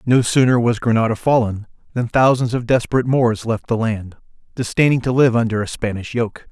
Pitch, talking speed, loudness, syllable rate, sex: 120 Hz, 185 wpm, -18 LUFS, 5.6 syllables/s, male